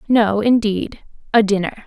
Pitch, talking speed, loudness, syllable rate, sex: 215 Hz, 95 wpm, -17 LUFS, 4.8 syllables/s, female